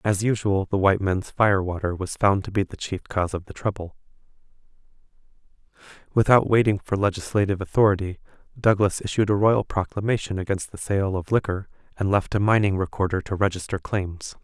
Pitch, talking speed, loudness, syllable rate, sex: 100 Hz, 165 wpm, -23 LUFS, 5.8 syllables/s, male